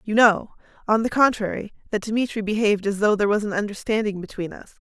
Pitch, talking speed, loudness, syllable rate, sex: 210 Hz, 195 wpm, -22 LUFS, 6.2 syllables/s, female